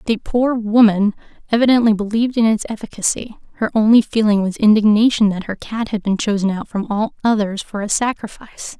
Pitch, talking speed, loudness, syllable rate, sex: 215 Hz, 175 wpm, -17 LUFS, 5.7 syllables/s, female